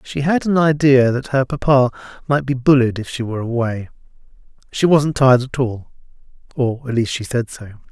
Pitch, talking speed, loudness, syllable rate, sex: 130 Hz, 190 wpm, -17 LUFS, 5.2 syllables/s, male